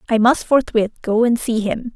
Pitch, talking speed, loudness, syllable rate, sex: 230 Hz, 215 wpm, -17 LUFS, 4.8 syllables/s, female